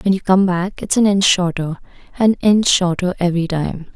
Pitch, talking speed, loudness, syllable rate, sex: 185 Hz, 180 wpm, -16 LUFS, 5.0 syllables/s, female